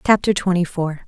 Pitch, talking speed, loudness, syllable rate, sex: 180 Hz, 170 wpm, -19 LUFS, 5.6 syllables/s, female